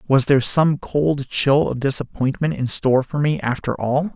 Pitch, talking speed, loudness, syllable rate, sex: 135 Hz, 190 wpm, -19 LUFS, 4.8 syllables/s, male